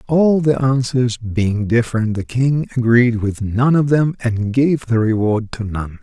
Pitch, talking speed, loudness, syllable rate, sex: 120 Hz, 180 wpm, -17 LUFS, 4.0 syllables/s, male